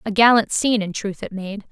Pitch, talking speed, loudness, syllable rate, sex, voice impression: 210 Hz, 245 wpm, -19 LUFS, 5.6 syllables/s, female, feminine, slightly adult-like, slightly clear, slightly refreshing, friendly